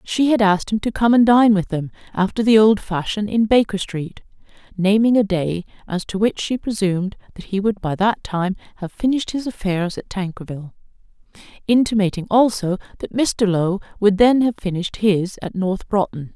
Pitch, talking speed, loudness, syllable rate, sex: 200 Hz, 185 wpm, -19 LUFS, 5.2 syllables/s, female